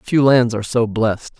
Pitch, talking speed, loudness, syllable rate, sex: 120 Hz, 215 wpm, -17 LUFS, 4.6 syllables/s, male